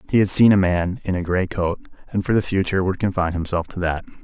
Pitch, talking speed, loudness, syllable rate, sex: 95 Hz, 255 wpm, -20 LUFS, 6.6 syllables/s, male